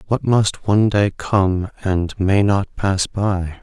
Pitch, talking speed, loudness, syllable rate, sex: 100 Hz, 165 wpm, -18 LUFS, 3.4 syllables/s, male